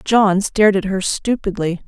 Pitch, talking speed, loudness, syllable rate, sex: 195 Hz, 160 wpm, -17 LUFS, 4.7 syllables/s, female